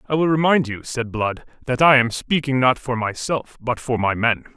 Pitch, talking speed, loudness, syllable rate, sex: 125 Hz, 225 wpm, -20 LUFS, 4.9 syllables/s, male